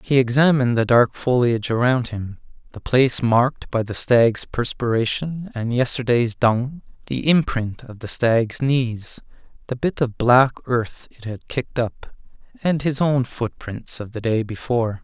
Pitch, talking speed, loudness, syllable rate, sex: 120 Hz, 160 wpm, -20 LUFS, 4.4 syllables/s, male